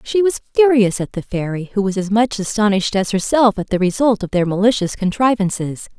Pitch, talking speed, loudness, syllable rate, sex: 210 Hz, 200 wpm, -17 LUFS, 5.7 syllables/s, female